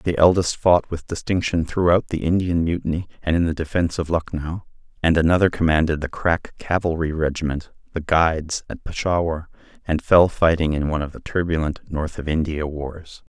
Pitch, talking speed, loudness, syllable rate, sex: 80 Hz, 170 wpm, -21 LUFS, 5.3 syllables/s, male